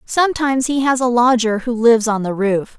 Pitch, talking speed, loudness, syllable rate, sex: 240 Hz, 215 wpm, -16 LUFS, 5.6 syllables/s, female